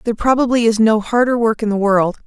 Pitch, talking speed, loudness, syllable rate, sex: 225 Hz, 240 wpm, -15 LUFS, 6.3 syllables/s, female